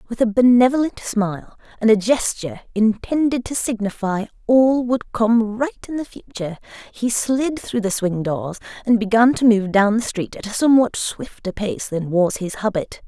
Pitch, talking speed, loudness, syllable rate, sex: 225 Hz, 180 wpm, -19 LUFS, 4.9 syllables/s, female